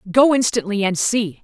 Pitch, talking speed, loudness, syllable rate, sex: 215 Hz, 165 wpm, -18 LUFS, 5.0 syllables/s, female